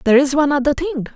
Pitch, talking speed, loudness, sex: 285 Hz, 260 wpm, -17 LUFS, female